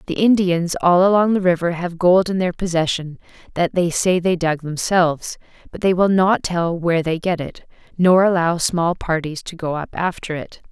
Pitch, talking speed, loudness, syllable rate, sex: 175 Hz, 195 wpm, -18 LUFS, 4.9 syllables/s, female